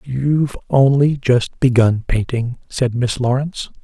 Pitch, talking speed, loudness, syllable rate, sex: 130 Hz, 125 wpm, -17 LUFS, 4.0 syllables/s, male